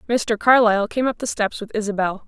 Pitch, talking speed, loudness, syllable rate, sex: 215 Hz, 210 wpm, -19 LUFS, 5.8 syllables/s, female